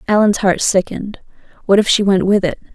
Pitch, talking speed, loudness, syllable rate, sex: 195 Hz, 195 wpm, -15 LUFS, 5.9 syllables/s, female